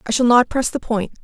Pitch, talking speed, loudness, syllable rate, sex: 240 Hz, 295 wpm, -17 LUFS, 5.9 syllables/s, female